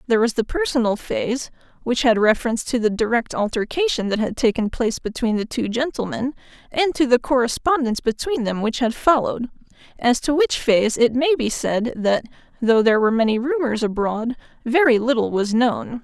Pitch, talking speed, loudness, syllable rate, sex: 240 Hz, 175 wpm, -20 LUFS, 5.6 syllables/s, female